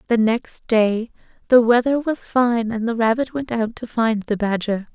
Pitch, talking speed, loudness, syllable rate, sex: 230 Hz, 195 wpm, -20 LUFS, 4.4 syllables/s, female